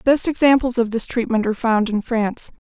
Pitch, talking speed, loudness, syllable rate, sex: 235 Hz, 225 wpm, -19 LUFS, 6.2 syllables/s, female